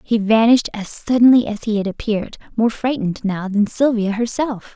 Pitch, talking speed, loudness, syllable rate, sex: 220 Hz, 175 wpm, -18 LUFS, 5.5 syllables/s, female